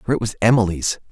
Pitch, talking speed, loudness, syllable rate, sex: 105 Hz, 215 wpm, -19 LUFS, 6.7 syllables/s, male